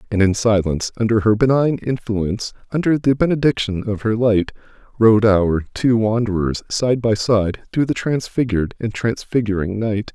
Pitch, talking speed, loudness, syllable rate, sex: 110 Hz, 155 wpm, -18 LUFS, 4.9 syllables/s, male